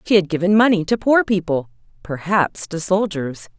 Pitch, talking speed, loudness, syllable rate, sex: 180 Hz, 165 wpm, -18 LUFS, 4.9 syllables/s, female